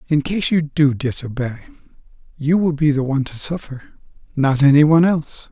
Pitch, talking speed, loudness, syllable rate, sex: 145 Hz, 165 wpm, -18 LUFS, 5.5 syllables/s, male